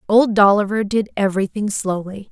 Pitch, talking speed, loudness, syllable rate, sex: 205 Hz, 130 wpm, -18 LUFS, 5.3 syllables/s, female